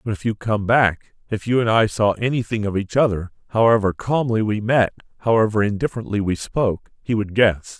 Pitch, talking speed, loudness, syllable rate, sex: 110 Hz, 190 wpm, -20 LUFS, 5.5 syllables/s, male